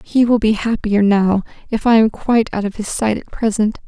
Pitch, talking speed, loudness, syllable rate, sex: 215 Hz, 230 wpm, -16 LUFS, 5.2 syllables/s, female